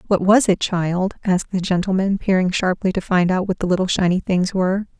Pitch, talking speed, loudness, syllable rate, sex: 185 Hz, 215 wpm, -19 LUFS, 5.6 syllables/s, female